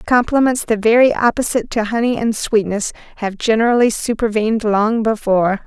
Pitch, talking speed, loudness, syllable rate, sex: 225 Hz, 140 wpm, -16 LUFS, 5.6 syllables/s, female